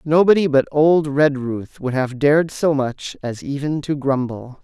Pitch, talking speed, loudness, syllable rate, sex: 145 Hz, 170 wpm, -19 LUFS, 4.3 syllables/s, male